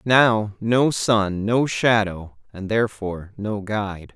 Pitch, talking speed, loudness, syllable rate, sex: 105 Hz, 130 wpm, -21 LUFS, 3.7 syllables/s, male